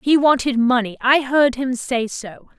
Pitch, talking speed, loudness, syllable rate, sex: 255 Hz, 185 wpm, -18 LUFS, 4.2 syllables/s, female